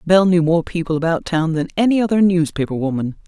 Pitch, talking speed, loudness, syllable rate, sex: 170 Hz, 200 wpm, -17 LUFS, 6.4 syllables/s, female